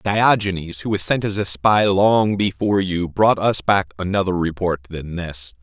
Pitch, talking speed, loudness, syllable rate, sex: 95 Hz, 180 wpm, -19 LUFS, 4.6 syllables/s, male